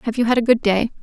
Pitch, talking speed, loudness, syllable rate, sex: 230 Hz, 350 wpm, -17 LUFS, 7.4 syllables/s, female